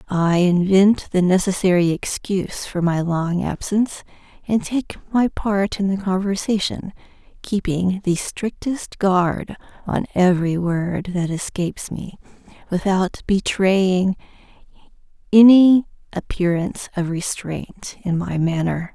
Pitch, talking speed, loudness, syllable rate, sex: 190 Hz, 110 wpm, -19 LUFS, 4.0 syllables/s, female